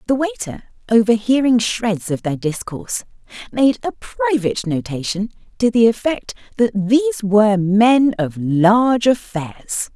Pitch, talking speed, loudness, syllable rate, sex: 220 Hz, 125 wpm, -17 LUFS, 4.6 syllables/s, female